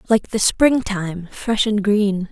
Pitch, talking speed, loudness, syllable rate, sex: 205 Hz, 180 wpm, -19 LUFS, 3.4 syllables/s, female